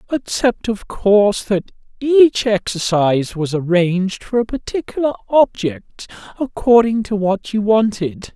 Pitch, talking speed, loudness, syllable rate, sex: 210 Hz, 120 wpm, -17 LUFS, 4.2 syllables/s, male